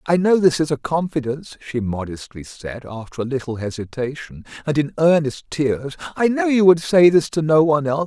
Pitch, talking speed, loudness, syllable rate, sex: 145 Hz, 200 wpm, -19 LUFS, 5.4 syllables/s, male